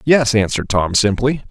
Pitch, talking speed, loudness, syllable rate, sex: 115 Hz, 160 wpm, -16 LUFS, 5.2 syllables/s, male